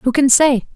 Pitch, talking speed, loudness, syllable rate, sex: 265 Hz, 240 wpm, -13 LUFS, 4.6 syllables/s, female